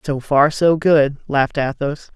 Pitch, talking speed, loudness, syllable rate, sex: 145 Hz, 165 wpm, -17 LUFS, 4.2 syllables/s, male